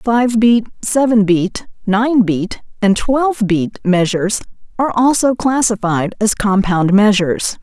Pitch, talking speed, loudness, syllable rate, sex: 215 Hz, 125 wpm, -15 LUFS, 4.1 syllables/s, female